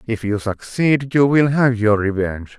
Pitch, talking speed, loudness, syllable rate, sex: 115 Hz, 185 wpm, -17 LUFS, 4.5 syllables/s, male